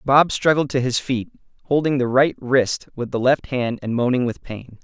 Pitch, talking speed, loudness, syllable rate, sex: 130 Hz, 210 wpm, -20 LUFS, 4.7 syllables/s, male